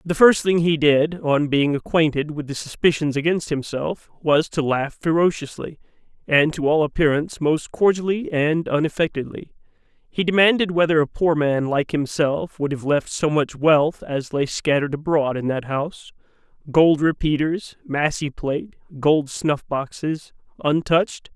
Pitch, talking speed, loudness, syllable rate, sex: 155 Hz, 145 wpm, -20 LUFS, 4.6 syllables/s, male